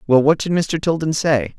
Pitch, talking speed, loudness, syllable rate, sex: 150 Hz, 225 wpm, -18 LUFS, 4.9 syllables/s, male